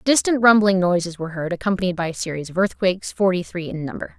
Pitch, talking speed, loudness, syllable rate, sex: 185 Hz, 215 wpm, -20 LUFS, 6.6 syllables/s, female